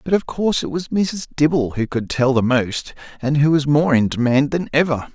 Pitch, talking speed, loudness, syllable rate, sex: 145 Hz, 235 wpm, -18 LUFS, 5.1 syllables/s, male